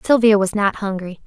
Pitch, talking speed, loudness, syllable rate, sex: 205 Hz, 190 wpm, -17 LUFS, 5.3 syllables/s, female